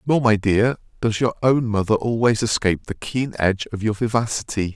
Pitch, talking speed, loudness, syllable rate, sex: 110 Hz, 190 wpm, -21 LUFS, 5.4 syllables/s, male